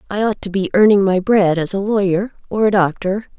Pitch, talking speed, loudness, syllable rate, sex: 200 Hz, 230 wpm, -16 LUFS, 5.4 syllables/s, female